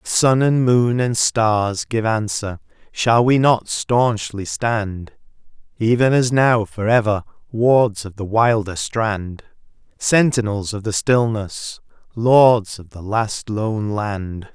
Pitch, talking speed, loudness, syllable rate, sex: 110 Hz, 125 wpm, -18 LUFS, 3.1 syllables/s, male